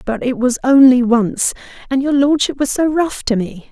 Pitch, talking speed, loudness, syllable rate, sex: 255 Hz, 210 wpm, -15 LUFS, 4.7 syllables/s, female